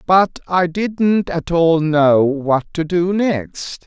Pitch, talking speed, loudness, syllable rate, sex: 170 Hz, 170 wpm, -16 LUFS, 3.0 syllables/s, male